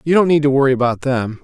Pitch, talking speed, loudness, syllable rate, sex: 140 Hz, 295 wpm, -15 LUFS, 6.8 syllables/s, male